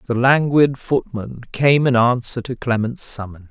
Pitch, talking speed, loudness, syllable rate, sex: 120 Hz, 155 wpm, -18 LUFS, 4.3 syllables/s, male